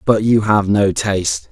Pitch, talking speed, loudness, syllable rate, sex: 100 Hz, 200 wpm, -15 LUFS, 4.3 syllables/s, male